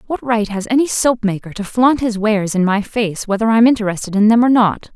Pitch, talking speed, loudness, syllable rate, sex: 220 Hz, 240 wpm, -15 LUFS, 5.7 syllables/s, female